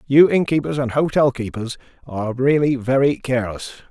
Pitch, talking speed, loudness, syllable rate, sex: 130 Hz, 140 wpm, -19 LUFS, 5.5 syllables/s, male